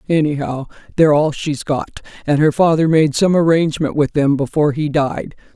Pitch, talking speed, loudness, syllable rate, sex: 150 Hz, 185 wpm, -16 LUFS, 5.5 syllables/s, female